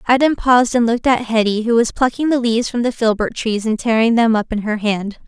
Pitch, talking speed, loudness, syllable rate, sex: 230 Hz, 250 wpm, -16 LUFS, 5.9 syllables/s, female